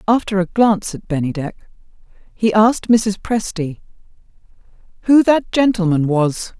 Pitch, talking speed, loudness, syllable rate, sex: 200 Hz, 120 wpm, -16 LUFS, 4.9 syllables/s, female